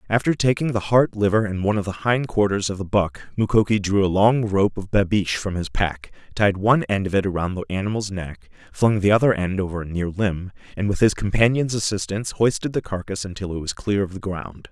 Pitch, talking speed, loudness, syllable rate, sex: 100 Hz, 230 wpm, -21 LUFS, 5.7 syllables/s, male